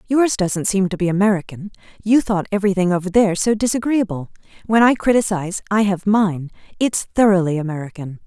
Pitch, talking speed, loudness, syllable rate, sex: 195 Hz, 150 wpm, -18 LUFS, 5.8 syllables/s, female